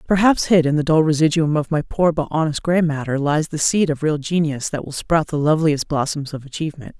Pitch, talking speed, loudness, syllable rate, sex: 155 Hz, 230 wpm, -19 LUFS, 5.7 syllables/s, female